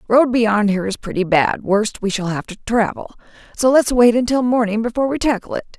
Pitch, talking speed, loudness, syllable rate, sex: 225 Hz, 220 wpm, -17 LUFS, 5.6 syllables/s, female